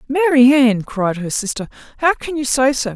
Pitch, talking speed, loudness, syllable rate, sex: 245 Hz, 180 wpm, -16 LUFS, 4.9 syllables/s, female